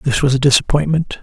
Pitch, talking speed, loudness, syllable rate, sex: 140 Hz, 195 wpm, -15 LUFS, 6.4 syllables/s, male